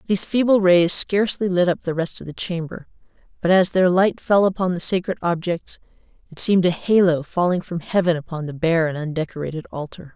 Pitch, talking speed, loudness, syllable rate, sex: 175 Hz, 195 wpm, -20 LUFS, 5.7 syllables/s, female